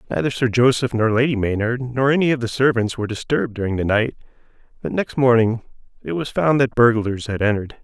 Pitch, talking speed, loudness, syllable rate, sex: 120 Hz, 200 wpm, -19 LUFS, 6.1 syllables/s, male